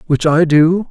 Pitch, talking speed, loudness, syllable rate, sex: 160 Hz, 200 wpm, -12 LUFS, 4.0 syllables/s, male